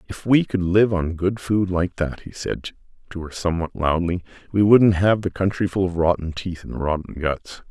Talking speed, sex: 210 wpm, male